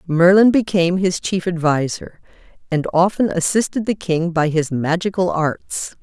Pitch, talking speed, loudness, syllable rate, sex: 175 Hz, 140 wpm, -18 LUFS, 4.5 syllables/s, female